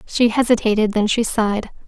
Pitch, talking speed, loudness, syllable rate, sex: 220 Hz, 160 wpm, -18 LUFS, 5.6 syllables/s, female